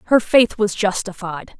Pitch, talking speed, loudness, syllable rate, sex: 200 Hz, 150 wpm, -18 LUFS, 4.6 syllables/s, female